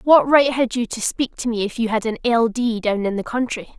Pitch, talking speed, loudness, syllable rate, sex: 230 Hz, 285 wpm, -20 LUFS, 5.2 syllables/s, female